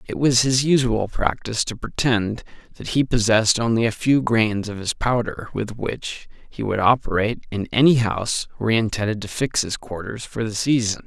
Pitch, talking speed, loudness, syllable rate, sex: 115 Hz, 190 wpm, -21 LUFS, 5.2 syllables/s, male